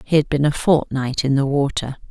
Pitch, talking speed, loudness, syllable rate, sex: 145 Hz, 230 wpm, -19 LUFS, 5.2 syllables/s, female